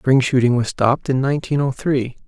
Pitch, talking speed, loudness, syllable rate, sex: 130 Hz, 210 wpm, -18 LUFS, 5.6 syllables/s, male